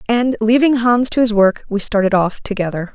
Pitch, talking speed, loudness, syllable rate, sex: 220 Hz, 205 wpm, -15 LUFS, 5.3 syllables/s, female